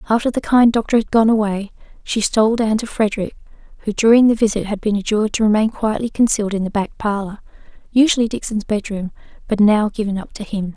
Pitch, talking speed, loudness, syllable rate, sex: 215 Hz, 200 wpm, -17 LUFS, 6.3 syllables/s, female